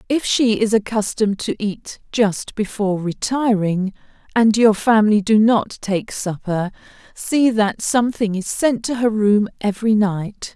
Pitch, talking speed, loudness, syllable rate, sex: 215 Hz, 150 wpm, -18 LUFS, 4.3 syllables/s, female